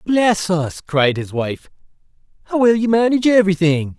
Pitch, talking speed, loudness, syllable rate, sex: 190 Hz, 150 wpm, -17 LUFS, 4.9 syllables/s, male